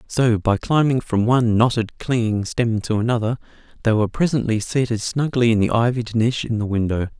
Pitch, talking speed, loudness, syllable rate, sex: 115 Hz, 185 wpm, -20 LUFS, 5.5 syllables/s, male